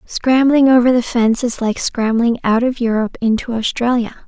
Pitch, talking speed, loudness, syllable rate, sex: 240 Hz, 170 wpm, -15 LUFS, 5.2 syllables/s, female